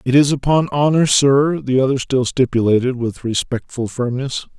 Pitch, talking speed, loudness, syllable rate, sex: 130 Hz, 155 wpm, -17 LUFS, 4.8 syllables/s, male